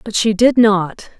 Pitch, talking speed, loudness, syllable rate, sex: 210 Hz, 200 wpm, -14 LUFS, 3.9 syllables/s, female